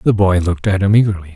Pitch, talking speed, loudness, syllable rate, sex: 95 Hz, 265 wpm, -15 LUFS, 7.4 syllables/s, male